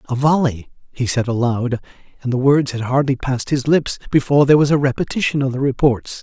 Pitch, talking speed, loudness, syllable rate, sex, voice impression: 135 Hz, 205 wpm, -17 LUFS, 6.1 syllables/s, male, masculine, middle-aged, tensed, powerful, hard, clear, halting, mature, friendly, slightly reassuring, wild, lively, strict, slightly intense